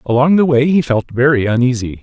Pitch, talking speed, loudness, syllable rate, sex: 130 Hz, 205 wpm, -13 LUFS, 5.8 syllables/s, male